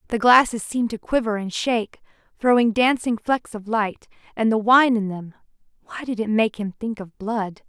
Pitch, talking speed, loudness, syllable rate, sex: 225 Hz, 190 wpm, -21 LUFS, 5.0 syllables/s, female